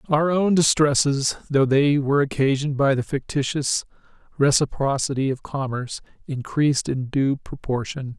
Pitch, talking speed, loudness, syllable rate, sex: 140 Hz, 125 wpm, -22 LUFS, 4.9 syllables/s, male